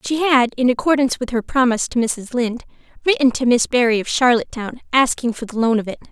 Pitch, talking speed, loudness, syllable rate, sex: 245 Hz, 215 wpm, -18 LUFS, 6.5 syllables/s, female